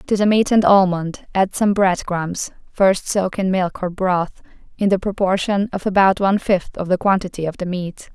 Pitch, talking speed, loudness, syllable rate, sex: 190 Hz, 205 wpm, -18 LUFS, 4.8 syllables/s, female